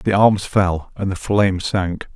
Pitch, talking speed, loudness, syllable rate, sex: 95 Hz, 195 wpm, -19 LUFS, 3.9 syllables/s, male